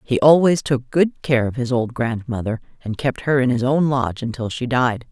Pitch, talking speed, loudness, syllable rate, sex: 125 Hz, 225 wpm, -19 LUFS, 5.0 syllables/s, female